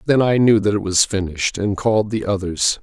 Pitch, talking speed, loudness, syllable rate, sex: 100 Hz, 235 wpm, -18 LUFS, 5.6 syllables/s, male